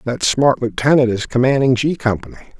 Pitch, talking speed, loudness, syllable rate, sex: 130 Hz, 160 wpm, -16 LUFS, 5.7 syllables/s, male